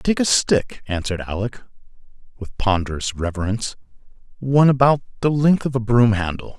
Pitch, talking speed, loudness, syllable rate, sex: 115 Hz, 145 wpm, -20 LUFS, 5.5 syllables/s, male